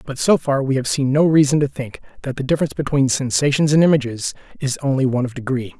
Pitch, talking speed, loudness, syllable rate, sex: 135 Hz, 230 wpm, -18 LUFS, 6.6 syllables/s, male